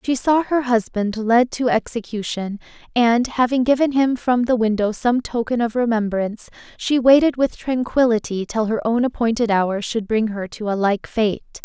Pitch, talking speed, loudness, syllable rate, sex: 230 Hz, 175 wpm, -19 LUFS, 4.7 syllables/s, female